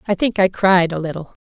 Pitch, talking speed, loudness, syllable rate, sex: 180 Hz, 250 wpm, -17 LUFS, 5.8 syllables/s, female